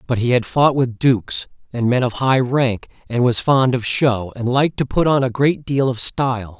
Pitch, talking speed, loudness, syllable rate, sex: 125 Hz, 235 wpm, -18 LUFS, 4.8 syllables/s, male